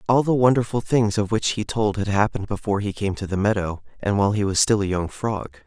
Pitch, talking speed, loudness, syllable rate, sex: 105 Hz, 255 wpm, -22 LUFS, 6.2 syllables/s, male